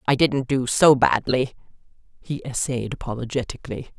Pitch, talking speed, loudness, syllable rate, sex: 125 Hz, 120 wpm, -22 LUFS, 5.2 syllables/s, female